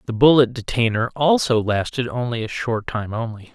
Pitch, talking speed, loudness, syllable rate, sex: 120 Hz, 170 wpm, -20 LUFS, 5.1 syllables/s, male